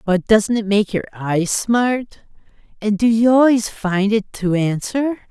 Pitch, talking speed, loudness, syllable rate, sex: 215 Hz, 170 wpm, -17 LUFS, 4.0 syllables/s, female